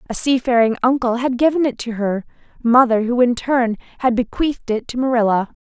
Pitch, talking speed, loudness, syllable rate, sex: 240 Hz, 180 wpm, -18 LUFS, 5.5 syllables/s, female